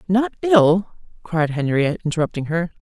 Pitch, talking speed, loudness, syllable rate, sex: 175 Hz, 130 wpm, -19 LUFS, 5.0 syllables/s, female